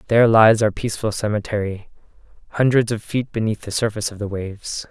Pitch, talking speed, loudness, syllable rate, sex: 110 Hz, 170 wpm, -20 LUFS, 6.2 syllables/s, male